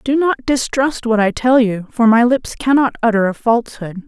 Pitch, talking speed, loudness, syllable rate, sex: 235 Hz, 205 wpm, -15 LUFS, 5.0 syllables/s, female